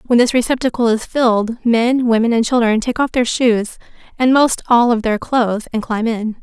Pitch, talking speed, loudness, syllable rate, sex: 235 Hz, 205 wpm, -15 LUFS, 5.1 syllables/s, female